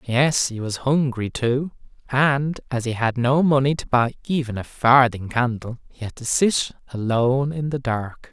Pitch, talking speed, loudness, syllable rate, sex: 125 Hz, 180 wpm, -21 LUFS, 4.3 syllables/s, male